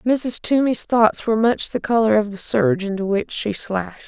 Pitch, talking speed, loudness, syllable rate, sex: 215 Hz, 205 wpm, -19 LUFS, 5.0 syllables/s, female